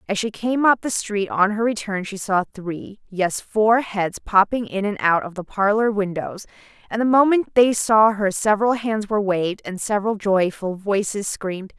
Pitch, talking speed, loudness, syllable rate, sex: 205 Hz, 195 wpm, -20 LUFS, 4.8 syllables/s, female